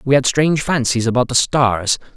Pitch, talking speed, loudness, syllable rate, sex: 130 Hz, 195 wpm, -16 LUFS, 5.2 syllables/s, male